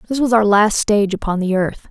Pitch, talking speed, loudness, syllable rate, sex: 210 Hz, 250 wpm, -16 LUFS, 5.9 syllables/s, female